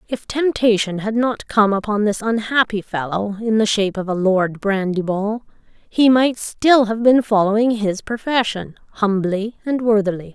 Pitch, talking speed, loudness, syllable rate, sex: 215 Hz, 155 wpm, -18 LUFS, 4.6 syllables/s, female